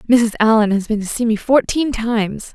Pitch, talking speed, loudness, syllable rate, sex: 225 Hz, 210 wpm, -17 LUFS, 5.3 syllables/s, female